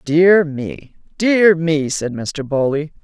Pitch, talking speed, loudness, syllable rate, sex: 160 Hz, 140 wpm, -16 LUFS, 3.0 syllables/s, female